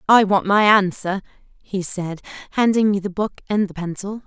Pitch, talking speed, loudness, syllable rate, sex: 195 Hz, 185 wpm, -20 LUFS, 5.1 syllables/s, female